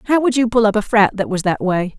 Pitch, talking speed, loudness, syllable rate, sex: 215 Hz, 335 wpm, -16 LUFS, 6.1 syllables/s, female